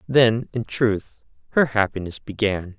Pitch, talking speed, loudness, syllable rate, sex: 110 Hz, 130 wpm, -22 LUFS, 3.9 syllables/s, male